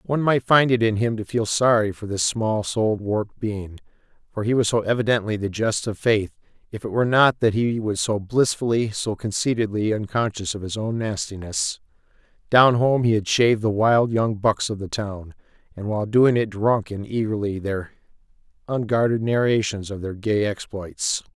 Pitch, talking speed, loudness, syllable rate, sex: 110 Hz, 185 wpm, -22 LUFS, 5.0 syllables/s, male